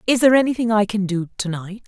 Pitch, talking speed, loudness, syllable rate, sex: 210 Hz, 255 wpm, -19 LUFS, 6.8 syllables/s, female